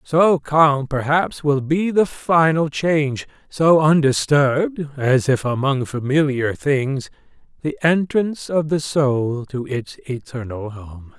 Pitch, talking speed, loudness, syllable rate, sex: 145 Hz, 125 wpm, -19 LUFS, 3.6 syllables/s, male